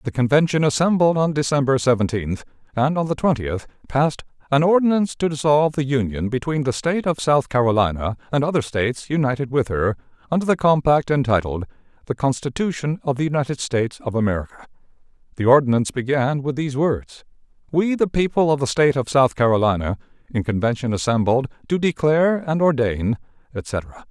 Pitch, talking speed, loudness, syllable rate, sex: 135 Hz, 160 wpm, -20 LUFS, 6.0 syllables/s, male